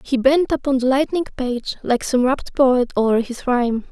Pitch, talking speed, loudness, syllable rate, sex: 255 Hz, 200 wpm, -19 LUFS, 4.9 syllables/s, female